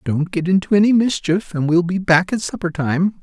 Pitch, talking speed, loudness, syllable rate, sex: 180 Hz, 225 wpm, -17 LUFS, 5.1 syllables/s, male